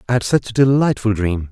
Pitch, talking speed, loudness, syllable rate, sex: 115 Hz, 240 wpm, -17 LUFS, 6.0 syllables/s, male